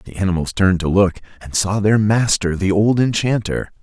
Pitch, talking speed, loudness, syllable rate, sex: 100 Hz, 190 wpm, -17 LUFS, 5.2 syllables/s, male